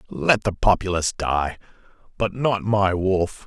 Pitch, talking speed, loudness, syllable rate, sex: 95 Hz, 140 wpm, -22 LUFS, 4.2 syllables/s, male